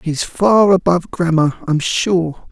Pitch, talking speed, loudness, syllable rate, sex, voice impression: 175 Hz, 145 wpm, -15 LUFS, 4.1 syllables/s, male, masculine, middle-aged, thick, tensed, slightly soft, cool, calm, friendly, reassuring, wild, slightly kind, slightly modest